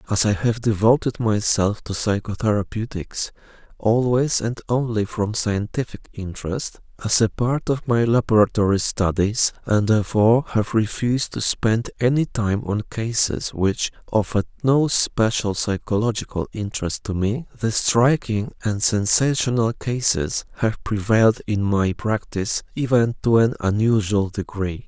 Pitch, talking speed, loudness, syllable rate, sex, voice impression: 110 Hz, 130 wpm, -21 LUFS, 4.5 syllables/s, male, masculine, slightly young, adult-like, thick, relaxed, weak, dark, very soft, muffled, slightly halting, slightly raspy, cool, intellectual, slightly refreshing, very sincere, very calm, very friendly, reassuring, unique, elegant, slightly wild, slightly sweet, slightly lively, very kind, very modest, light